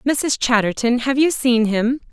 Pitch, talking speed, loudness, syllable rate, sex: 245 Hz, 170 wpm, -18 LUFS, 4.0 syllables/s, female